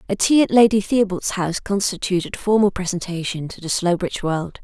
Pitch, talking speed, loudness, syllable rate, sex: 190 Hz, 170 wpm, -20 LUFS, 5.6 syllables/s, female